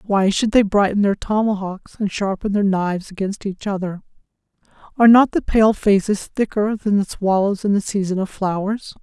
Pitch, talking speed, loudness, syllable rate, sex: 200 Hz, 180 wpm, -19 LUFS, 5.1 syllables/s, female